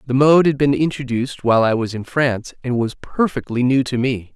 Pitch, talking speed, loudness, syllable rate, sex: 130 Hz, 220 wpm, -18 LUFS, 5.7 syllables/s, male